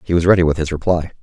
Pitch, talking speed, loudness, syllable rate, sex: 85 Hz, 295 wpm, -16 LUFS, 7.6 syllables/s, male